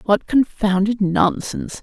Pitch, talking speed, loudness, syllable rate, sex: 210 Hz, 100 wpm, -19 LUFS, 4.1 syllables/s, female